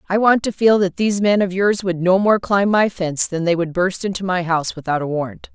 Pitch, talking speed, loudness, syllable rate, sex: 185 Hz, 270 wpm, -18 LUFS, 5.8 syllables/s, female